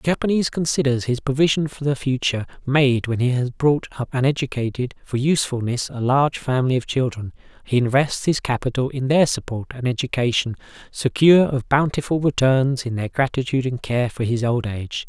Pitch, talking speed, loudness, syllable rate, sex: 130 Hz, 180 wpm, -21 LUFS, 5.8 syllables/s, male